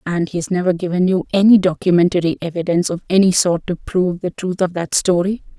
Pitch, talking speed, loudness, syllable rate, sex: 180 Hz, 195 wpm, -17 LUFS, 6.0 syllables/s, female